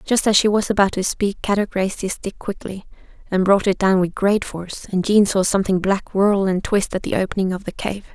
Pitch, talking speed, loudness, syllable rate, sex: 195 Hz, 245 wpm, -19 LUFS, 5.6 syllables/s, female